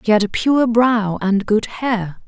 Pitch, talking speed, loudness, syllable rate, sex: 220 Hz, 210 wpm, -17 LUFS, 3.8 syllables/s, female